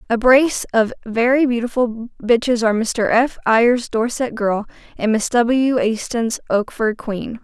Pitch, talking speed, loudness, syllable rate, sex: 235 Hz, 145 wpm, -18 LUFS, 4.3 syllables/s, female